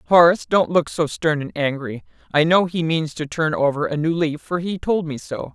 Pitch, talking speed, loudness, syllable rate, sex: 160 Hz, 240 wpm, -20 LUFS, 5.2 syllables/s, female